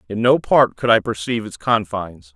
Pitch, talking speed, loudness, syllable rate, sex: 105 Hz, 205 wpm, -18 LUFS, 5.5 syllables/s, male